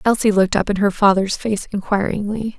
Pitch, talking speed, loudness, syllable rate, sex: 205 Hz, 185 wpm, -18 LUFS, 5.7 syllables/s, female